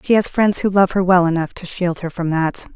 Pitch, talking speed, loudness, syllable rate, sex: 180 Hz, 285 wpm, -17 LUFS, 5.4 syllables/s, female